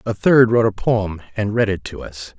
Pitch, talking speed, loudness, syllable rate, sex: 105 Hz, 250 wpm, -18 LUFS, 5.2 syllables/s, male